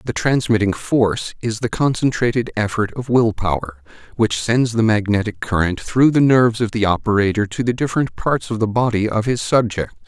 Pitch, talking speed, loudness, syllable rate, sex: 110 Hz, 185 wpm, -18 LUFS, 5.4 syllables/s, male